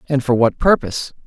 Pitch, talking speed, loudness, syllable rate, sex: 130 Hz, 190 wpm, -17 LUFS, 5.9 syllables/s, male